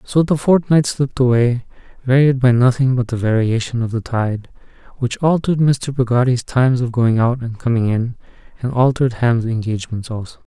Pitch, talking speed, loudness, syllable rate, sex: 125 Hz, 170 wpm, -17 LUFS, 5.4 syllables/s, male